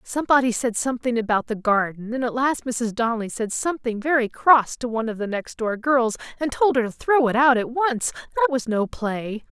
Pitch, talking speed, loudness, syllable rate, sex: 240 Hz, 220 wpm, -22 LUFS, 5.7 syllables/s, female